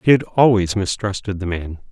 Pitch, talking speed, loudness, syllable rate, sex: 100 Hz, 190 wpm, -19 LUFS, 5.3 syllables/s, male